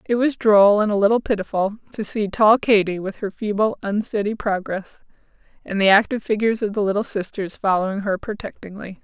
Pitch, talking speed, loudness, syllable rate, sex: 205 Hz, 180 wpm, -20 LUFS, 5.6 syllables/s, female